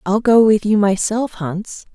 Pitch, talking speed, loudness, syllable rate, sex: 210 Hz, 185 wpm, -16 LUFS, 4.0 syllables/s, female